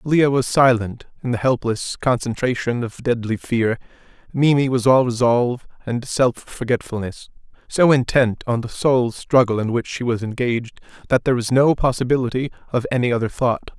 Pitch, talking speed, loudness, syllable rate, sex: 125 Hz, 160 wpm, -19 LUFS, 5.2 syllables/s, male